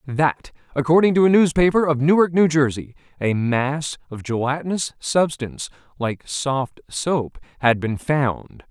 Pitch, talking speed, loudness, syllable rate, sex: 145 Hz, 140 wpm, -20 LUFS, 4.3 syllables/s, male